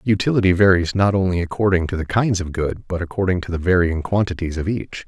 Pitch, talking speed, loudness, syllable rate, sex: 90 Hz, 215 wpm, -19 LUFS, 6.0 syllables/s, male